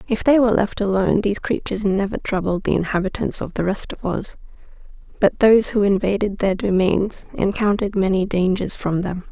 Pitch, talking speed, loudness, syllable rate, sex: 200 Hz, 175 wpm, -20 LUFS, 5.7 syllables/s, female